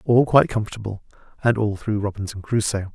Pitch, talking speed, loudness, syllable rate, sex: 105 Hz, 165 wpm, -22 LUFS, 6.2 syllables/s, male